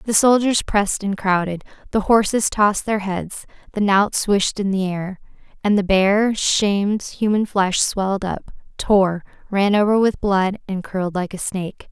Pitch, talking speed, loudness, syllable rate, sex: 200 Hz, 170 wpm, -19 LUFS, 4.5 syllables/s, female